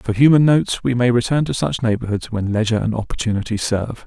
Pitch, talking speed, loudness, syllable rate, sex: 115 Hz, 205 wpm, -18 LUFS, 6.5 syllables/s, male